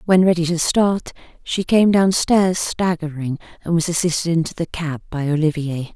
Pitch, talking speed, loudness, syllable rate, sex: 170 Hz, 160 wpm, -19 LUFS, 4.8 syllables/s, female